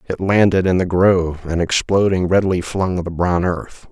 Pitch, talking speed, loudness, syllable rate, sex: 90 Hz, 185 wpm, -17 LUFS, 4.6 syllables/s, male